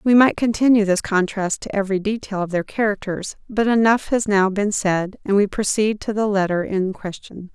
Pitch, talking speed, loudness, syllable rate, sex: 205 Hz, 200 wpm, -20 LUFS, 5.1 syllables/s, female